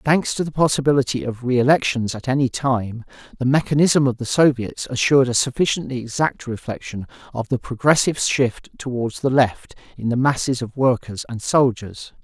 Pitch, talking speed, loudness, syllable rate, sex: 130 Hz, 160 wpm, -20 LUFS, 5.2 syllables/s, male